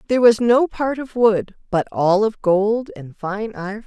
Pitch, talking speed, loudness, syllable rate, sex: 220 Hz, 200 wpm, -19 LUFS, 4.7 syllables/s, female